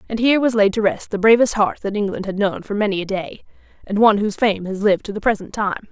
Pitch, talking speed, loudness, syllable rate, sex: 205 Hz, 275 wpm, -18 LUFS, 6.6 syllables/s, female